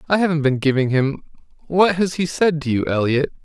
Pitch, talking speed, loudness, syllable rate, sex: 150 Hz, 210 wpm, -19 LUFS, 5.6 syllables/s, male